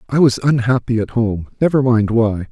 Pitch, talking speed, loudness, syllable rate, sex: 120 Hz, 165 wpm, -16 LUFS, 5.1 syllables/s, male